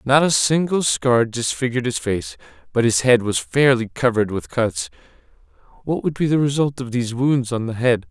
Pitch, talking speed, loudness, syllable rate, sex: 125 Hz, 195 wpm, -19 LUFS, 5.3 syllables/s, male